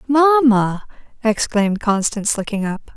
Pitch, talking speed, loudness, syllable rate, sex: 230 Hz, 100 wpm, -17 LUFS, 4.5 syllables/s, female